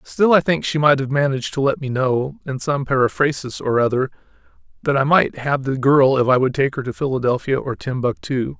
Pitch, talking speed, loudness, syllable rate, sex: 135 Hz, 215 wpm, -19 LUFS, 5.5 syllables/s, male